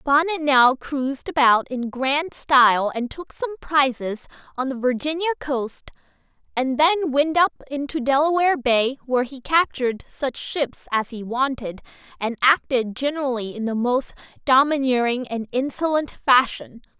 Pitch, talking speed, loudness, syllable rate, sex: 270 Hz, 140 wpm, -21 LUFS, 4.6 syllables/s, female